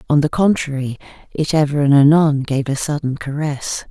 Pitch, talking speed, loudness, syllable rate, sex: 145 Hz, 170 wpm, -17 LUFS, 5.3 syllables/s, female